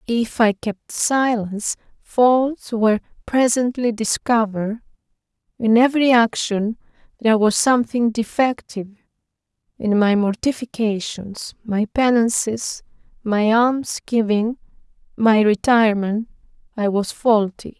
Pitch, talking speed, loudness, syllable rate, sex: 225 Hz, 90 wpm, -19 LUFS, 4.1 syllables/s, female